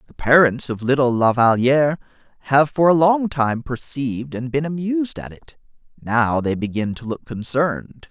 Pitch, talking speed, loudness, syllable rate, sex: 135 Hz, 170 wpm, -19 LUFS, 4.8 syllables/s, male